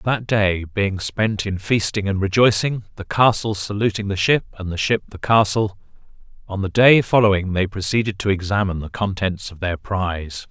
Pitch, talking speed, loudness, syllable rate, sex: 100 Hz, 175 wpm, -20 LUFS, 5.0 syllables/s, male